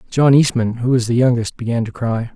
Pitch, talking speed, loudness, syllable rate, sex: 120 Hz, 230 wpm, -17 LUFS, 5.7 syllables/s, male